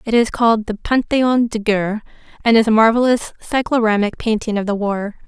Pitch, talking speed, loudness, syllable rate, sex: 225 Hz, 180 wpm, -17 LUFS, 5.5 syllables/s, female